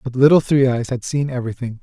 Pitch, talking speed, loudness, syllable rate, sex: 130 Hz, 230 wpm, -18 LUFS, 6.4 syllables/s, male